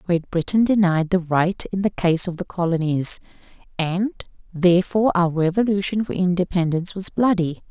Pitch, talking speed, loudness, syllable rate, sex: 180 Hz, 150 wpm, -20 LUFS, 5.1 syllables/s, female